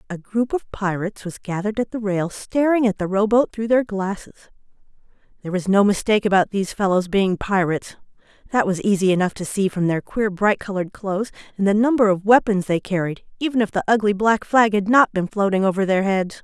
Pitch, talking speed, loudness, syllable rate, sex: 200 Hz, 205 wpm, -20 LUFS, 6.0 syllables/s, female